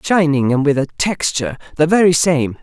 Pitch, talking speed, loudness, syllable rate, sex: 150 Hz, 160 wpm, -15 LUFS, 5.5 syllables/s, male